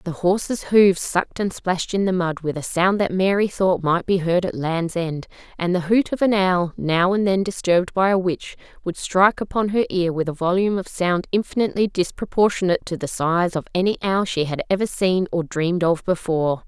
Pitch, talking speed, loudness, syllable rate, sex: 180 Hz, 215 wpm, -21 LUFS, 5.4 syllables/s, female